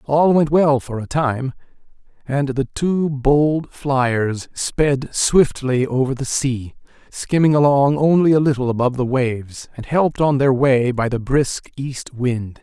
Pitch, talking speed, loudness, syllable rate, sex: 135 Hz, 160 wpm, -18 LUFS, 3.9 syllables/s, male